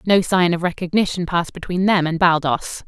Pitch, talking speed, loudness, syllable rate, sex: 175 Hz, 190 wpm, -19 LUFS, 5.5 syllables/s, female